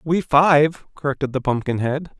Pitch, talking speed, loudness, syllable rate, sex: 145 Hz, 135 wpm, -19 LUFS, 4.5 syllables/s, male